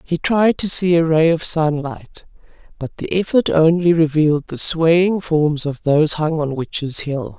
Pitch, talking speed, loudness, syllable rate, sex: 160 Hz, 180 wpm, -17 LUFS, 4.3 syllables/s, female